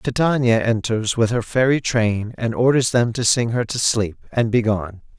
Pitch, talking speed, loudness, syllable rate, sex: 115 Hz, 195 wpm, -19 LUFS, 4.5 syllables/s, male